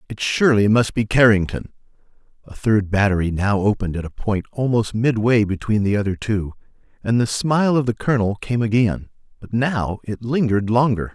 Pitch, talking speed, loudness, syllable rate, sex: 110 Hz, 170 wpm, -19 LUFS, 5.4 syllables/s, male